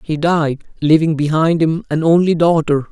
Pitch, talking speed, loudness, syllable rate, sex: 160 Hz, 165 wpm, -15 LUFS, 4.7 syllables/s, male